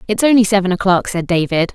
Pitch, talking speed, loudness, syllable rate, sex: 195 Hz, 205 wpm, -15 LUFS, 6.3 syllables/s, female